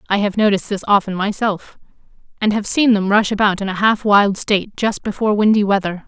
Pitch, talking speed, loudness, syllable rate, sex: 205 Hz, 205 wpm, -16 LUFS, 6.0 syllables/s, female